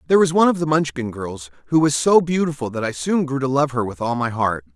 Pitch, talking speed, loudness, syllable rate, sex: 135 Hz, 280 wpm, -20 LUFS, 6.3 syllables/s, male